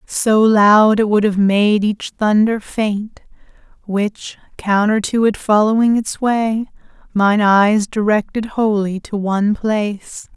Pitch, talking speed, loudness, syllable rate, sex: 210 Hz, 135 wpm, -16 LUFS, 3.6 syllables/s, female